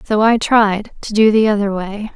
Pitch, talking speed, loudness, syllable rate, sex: 210 Hz, 195 wpm, -15 LUFS, 4.7 syllables/s, female